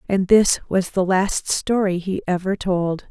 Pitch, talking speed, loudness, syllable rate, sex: 190 Hz, 175 wpm, -20 LUFS, 4.0 syllables/s, female